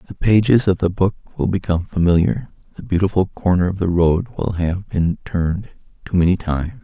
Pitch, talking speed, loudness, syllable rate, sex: 95 Hz, 185 wpm, -19 LUFS, 5.5 syllables/s, male